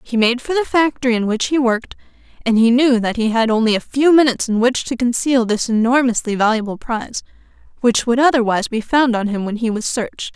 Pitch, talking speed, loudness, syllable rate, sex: 240 Hz, 220 wpm, -17 LUFS, 6.0 syllables/s, female